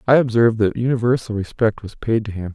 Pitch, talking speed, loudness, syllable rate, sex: 115 Hz, 210 wpm, -19 LUFS, 6.3 syllables/s, male